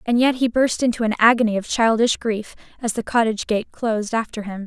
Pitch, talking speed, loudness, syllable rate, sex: 225 Hz, 220 wpm, -20 LUFS, 5.9 syllables/s, female